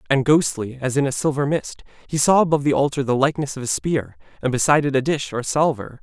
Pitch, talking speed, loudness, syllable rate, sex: 140 Hz, 240 wpm, -20 LUFS, 6.6 syllables/s, male